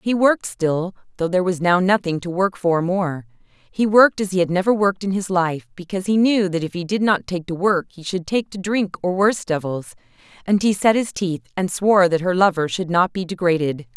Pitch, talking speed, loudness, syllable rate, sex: 185 Hz, 235 wpm, -20 LUFS, 5.5 syllables/s, female